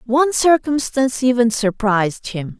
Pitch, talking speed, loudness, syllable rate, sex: 245 Hz, 115 wpm, -17 LUFS, 4.9 syllables/s, female